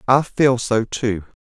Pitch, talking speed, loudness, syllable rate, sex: 120 Hz, 165 wpm, -19 LUFS, 3.6 syllables/s, male